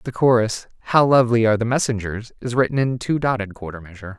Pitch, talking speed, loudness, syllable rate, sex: 115 Hz, 200 wpm, -19 LUFS, 6.7 syllables/s, male